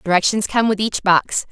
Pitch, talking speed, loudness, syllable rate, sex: 200 Hz, 200 wpm, -17 LUFS, 5.0 syllables/s, female